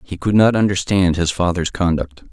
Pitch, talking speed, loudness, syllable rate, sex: 90 Hz, 180 wpm, -17 LUFS, 5.1 syllables/s, male